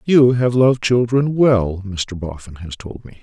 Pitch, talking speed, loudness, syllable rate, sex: 115 Hz, 185 wpm, -16 LUFS, 4.3 syllables/s, male